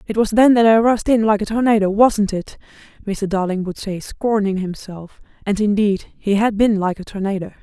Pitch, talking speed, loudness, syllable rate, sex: 205 Hz, 205 wpm, -17 LUFS, 5.1 syllables/s, female